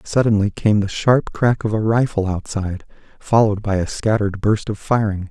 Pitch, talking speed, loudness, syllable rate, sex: 105 Hz, 180 wpm, -19 LUFS, 5.3 syllables/s, male